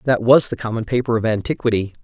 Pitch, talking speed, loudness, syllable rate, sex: 115 Hz, 205 wpm, -18 LUFS, 6.6 syllables/s, male